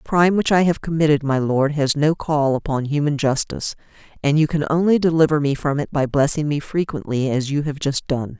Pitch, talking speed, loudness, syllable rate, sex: 145 Hz, 220 wpm, -19 LUFS, 5.6 syllables/s, female